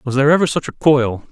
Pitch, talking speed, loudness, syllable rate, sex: 140 Hz, 275 wpm, -15 LUFS, 6.4 syllables/s, male